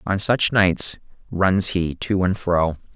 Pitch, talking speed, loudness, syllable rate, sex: 95 Hz, 165 wpm, -20 LUFS, 3.4 syllables/s, male